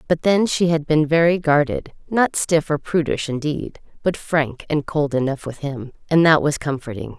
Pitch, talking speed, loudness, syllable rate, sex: 150 Hz, 190 wpm, -20 LUFS, 4.6 syllables/s, female